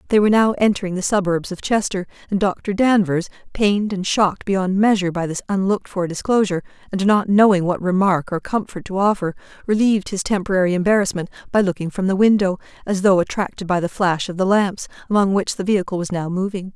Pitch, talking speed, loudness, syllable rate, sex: 190 Hz, 195 wpm, -19 LUFS, 6.2 syllables/s, female